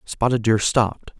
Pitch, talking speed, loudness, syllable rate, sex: 115 Hz, 150 wpm, -20 LUFS, 4.9 syllables/s, male